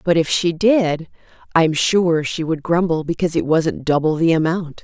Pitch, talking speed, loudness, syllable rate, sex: 165 Hz, 185 wpm, -18 LUFS, 4.7 syllables/s, female